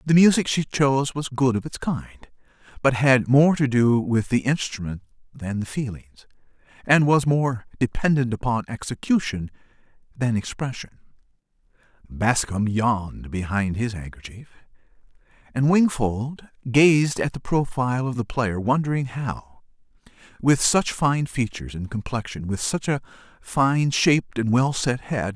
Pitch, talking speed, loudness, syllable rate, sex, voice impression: 125 Hz, 140 wpm, -22 LUFS, 4.5 syllables/s, male, very masculine, slightly old, slightly halting, slightly raspy, slightly mature, slightly wild